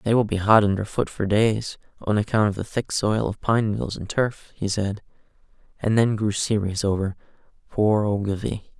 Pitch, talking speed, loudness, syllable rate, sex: 105 Hz, 190 wpm, -23 LUFS, 4.8 syllables/s, male